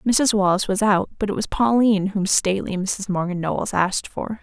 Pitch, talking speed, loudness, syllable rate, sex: 200 Hz, 205 wpm, -21 LUFS, 5.7 syllables/s, female